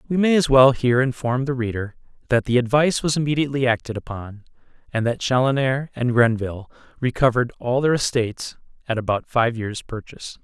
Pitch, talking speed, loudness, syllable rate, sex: 125 Hz, 165 wpm, -21 LUFS, 5.9 syllables/s, male